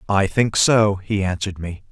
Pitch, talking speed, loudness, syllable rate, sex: 100 Hz, 190 wpm, -19 LUFS, 4.8 syllables/s, male